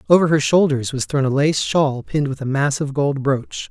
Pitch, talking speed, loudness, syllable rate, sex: 140 Hz, 225 wpm, -19 LUFS, 5.4 syllables/s, male